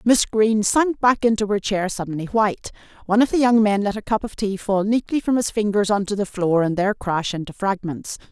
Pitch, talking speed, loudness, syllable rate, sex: 205 Hz, 240 wpm, -20 LUFS, 5.7 syllables/s, female